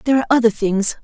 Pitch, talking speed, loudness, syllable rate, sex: 230 Hz, 230 wpm, -16 LUFS, 8.6 syllables/s, female